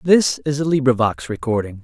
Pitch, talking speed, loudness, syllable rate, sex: 130 Hz, 165 wpm, -19 LUFS, 5.3 syllables/s, male